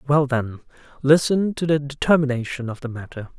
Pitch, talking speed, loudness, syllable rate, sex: 140 Hz, 160 wpm, -21 LUFS, 5.5 syllables/s, male